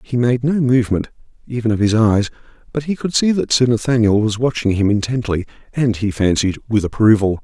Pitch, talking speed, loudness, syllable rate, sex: 115 Hz, 195 wpm, -17 LUFS, 5.7 syllables/s, male